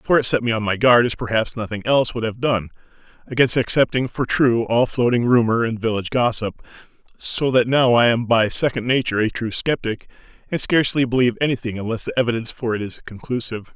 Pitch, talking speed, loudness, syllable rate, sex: 120 Hz, 200 wpm, -19 LUFS, 6.3 syllables/s, male